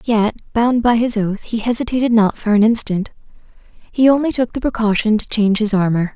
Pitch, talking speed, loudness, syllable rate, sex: 220 Hz, 195 wpm, -16 LUFS, 5.3 syllables/s, female